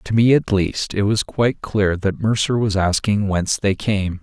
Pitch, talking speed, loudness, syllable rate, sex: 100 Hz, 215 wpm, -19 LUFS, 4.6 syllables/s, male